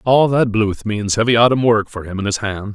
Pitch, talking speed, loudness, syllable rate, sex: 110 Hz, 265 wpm, -16 LUFS, 5.3 syllables/s, male